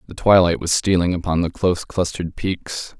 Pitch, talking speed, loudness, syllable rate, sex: 90 Hz, 180 wpm, -19 LUFS, 5.4 syllables/s, male